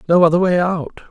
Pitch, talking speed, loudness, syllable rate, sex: 175 Hz, 220 wpm, -16 LUFS, 5.9 syllables/s, male